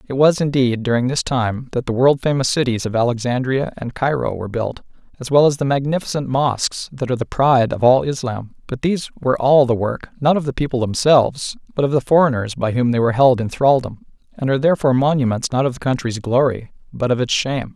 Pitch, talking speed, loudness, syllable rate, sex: 130 Hz, 220 wpm, -18 LUFS, 6.0 syllables/s, male